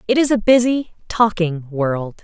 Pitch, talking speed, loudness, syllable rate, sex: 200 Hz, 160 wpm, -17 LUFS, 4.3 syllables/s, female